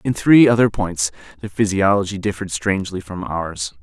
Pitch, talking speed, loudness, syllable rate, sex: 95 Hz, 155 wpm, -18 LUFS, 5.3 syllables/s, male